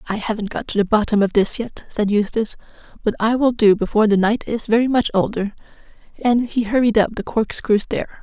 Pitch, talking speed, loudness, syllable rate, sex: 220 Hz, 210 wpm, -19 LUFS, 5.7 syllables/s, female